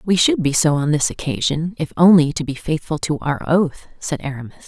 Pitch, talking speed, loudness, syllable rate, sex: 155 Hz, 220 wpm, -18 LUFS, 5.4 syllables/s, female